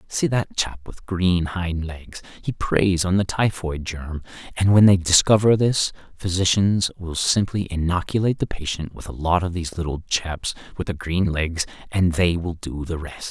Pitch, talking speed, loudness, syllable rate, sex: 90 Hz, 185 wpm, -22 LUFS, 4.6 syllables/s, male